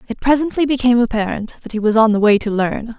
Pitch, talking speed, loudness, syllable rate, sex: 230 Hz, 240 wpm, -16 LUFS, 6.4 syllables/s, female